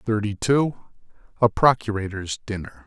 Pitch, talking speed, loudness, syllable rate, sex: 110 Hz, 105 wpm, -23 LUFS, 4.6 syllables/s, male